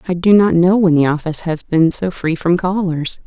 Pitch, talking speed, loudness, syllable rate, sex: 175 Hz, 240 wpm, -15 LUFS, 5.2 syllables/s, female